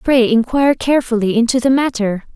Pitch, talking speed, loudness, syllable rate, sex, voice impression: 240 Hz, 155 wpm, -15 LUFS, 5.9 syllables/s, female, feminine, slightly young, slightly relaxed, powerful, bright, soft, fluent, slightly cute, friendly, reassuring, elegant, lively, kind, slightly modest